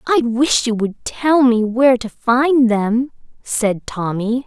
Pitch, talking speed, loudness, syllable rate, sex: 240 Hz, 160 wpm, -16 LUFS, 3.5 syllables/s, female